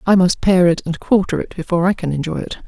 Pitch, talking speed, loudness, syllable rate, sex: 180 Hz, 270 wpm, -17 LUFS, 6.3 syllables/s, female